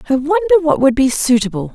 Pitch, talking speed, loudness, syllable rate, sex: 255 Hz, 205 wpm, -14 LUFS, 6.4 syllables/s, female